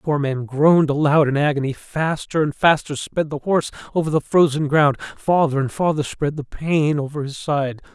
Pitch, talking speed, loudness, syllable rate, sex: 150 Hz, 190 wpm, -20 LUFS, 5.2 syllables/s, male